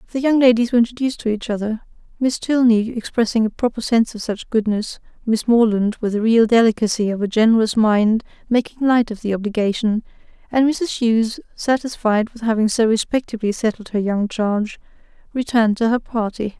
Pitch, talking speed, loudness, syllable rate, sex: 225 Hz, 175 wpm, -19 LUFS, 5.7 syllables/s, female